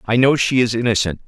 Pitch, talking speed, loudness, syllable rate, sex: 115 Hz, 235 wpm, -17 LUFS, 6.4 syllables/s, male